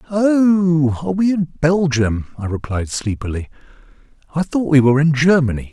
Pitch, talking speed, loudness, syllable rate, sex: 150 Hz, 145 wpm, -17 LUFS, 4.9 syllables/s, male